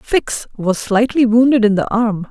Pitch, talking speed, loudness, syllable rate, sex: 225 Hz, 180 wpm, -15 LUFS, 4.3 syllables/s, female